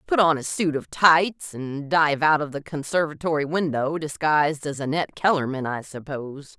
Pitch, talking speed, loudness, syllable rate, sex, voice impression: 150 Hz, 175 wpm, -23 LUFS, 5.0 syllables/s, female, feminine, middle-aged, tensed, powerful, hard, clear, intellectual, lively, slightly strict, intense, sharp